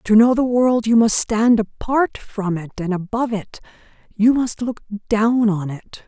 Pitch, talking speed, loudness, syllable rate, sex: 220 Hz, 190 wpm, -18 LUFS, 4.2 syllables/s, female